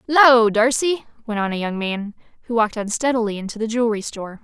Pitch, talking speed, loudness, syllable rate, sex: 225 Hz, 190 wpm, -20 LUFS, 6.2 syllables/s, female